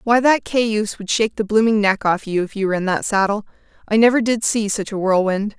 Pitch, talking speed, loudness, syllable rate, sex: 210 Hz, 245 wpm, -18 LUFS, 5.9 syllables/s, female